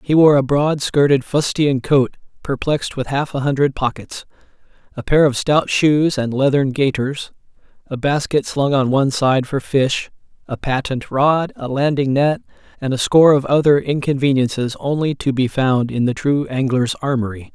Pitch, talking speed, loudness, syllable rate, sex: 135 Hz, 170 wpm, -17 LUFS, 4.7 syllables/s, male